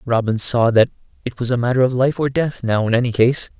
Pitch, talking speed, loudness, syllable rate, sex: 125 Hz, 250 wpm, -17 LUFS, 5.8 syllables/s, male